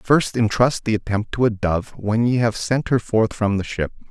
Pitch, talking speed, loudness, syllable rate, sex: 110 Hz, 235 wpm, -20 LUFS, 4.6 syllables/s, male